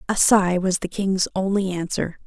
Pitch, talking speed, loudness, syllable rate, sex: 190 Hz, 185 wpm, -21 LUFS, 4.5 syllables/s, female